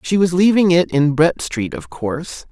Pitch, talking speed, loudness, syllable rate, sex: 165 Hz, 215 wpm, -17 LUFS, 4.6 syllables/s, male